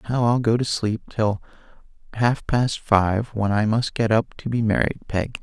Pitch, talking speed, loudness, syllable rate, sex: 110 Hz, 210 wpm, -22 LUFS, 4.8 syllables/s, male